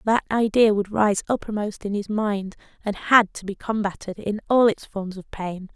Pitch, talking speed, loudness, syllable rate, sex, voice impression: 205 Hz, 200 wpm, -23 LUFS, 4.7 syllables/s, female, feminine, adult-like, tensed, clear, fluent, slightly raspy, intellectual, elegant, strict, sharp